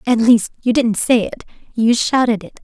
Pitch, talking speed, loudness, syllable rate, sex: 230 Hz, 160 wpm, -15 LUFS, 5.1 syllables/s, female